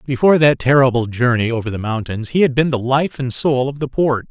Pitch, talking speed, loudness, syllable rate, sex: 130 Hz, 235 wpm, -16 LUFS, 5.8 syllables/s, male